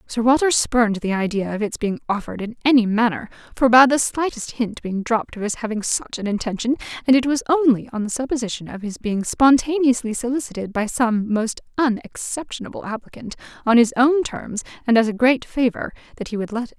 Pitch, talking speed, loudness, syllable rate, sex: 235 Hz, 205 wpm, -20 LUFS, 5.9 syllables/s, female